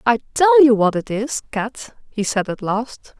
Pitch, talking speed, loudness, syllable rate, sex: 235 Hz, 205 wpm, -18 LUFS, 3.9 syllables/s, female